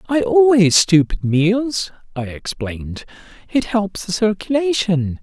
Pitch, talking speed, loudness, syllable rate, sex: 195 Hz, 125 wpm, -17 LUFS, 3.9 syllables/s, male